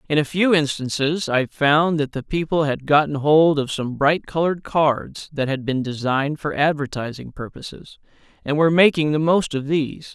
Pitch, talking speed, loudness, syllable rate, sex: 150 Hz, 185 wpm, -20 LUFS, 5.0 syllables/s, male